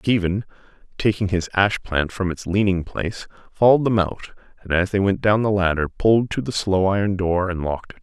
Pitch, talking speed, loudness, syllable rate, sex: 95 Hz, 195 wpm, -21 LUFS, 5.6 syllables/s, male